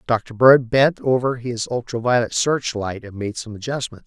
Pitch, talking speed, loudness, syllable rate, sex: 120 Hz, 190 wpm, -20 LUFS, 4.6 syllables/s, male